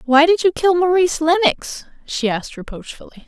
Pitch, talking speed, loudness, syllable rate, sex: 315 Hz, 165 wpm, -16 LUFS, 5.5 syllables/s, female